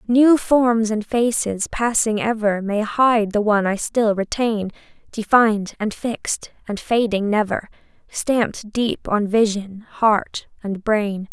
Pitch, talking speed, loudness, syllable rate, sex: 215 Hz, 140 wpm, -20 LUFS, 3.8 syllables/s, female